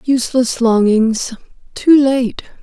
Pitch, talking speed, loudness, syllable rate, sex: 245 Hz, 90 wpm, -14 LUFS, 3.6 syllables/s, female